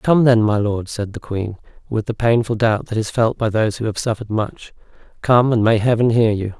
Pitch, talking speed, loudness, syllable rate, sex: 110 Hz, 235 wpm, -18 LUFS, 5.4 syllables/s, male